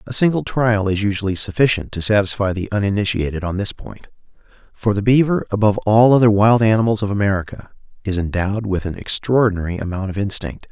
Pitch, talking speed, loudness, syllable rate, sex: 105 Hz, 175 wpm, -18 LUFS, 6.2 syllables/s, male